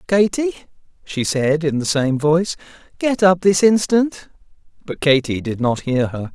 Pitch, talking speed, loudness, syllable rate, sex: 165 Hz, 160 wpm, -18 LUFS, 4.4 syllables/s, male